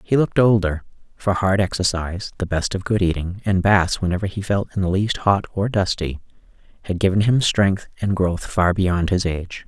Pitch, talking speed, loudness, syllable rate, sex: 95 Hz, 200 wpm, -20 LUFS, 5.2 syllables/s, male